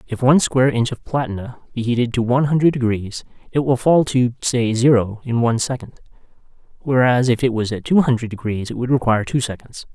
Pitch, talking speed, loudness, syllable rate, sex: 125 Hz, 205 wpm, -18 LUFS, 6.0 syllables/s, male